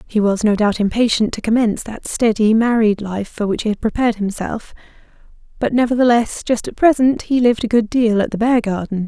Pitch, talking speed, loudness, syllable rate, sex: 225 Hz, 200 wpm, -17 LUFS, 5.7 syllables/s, female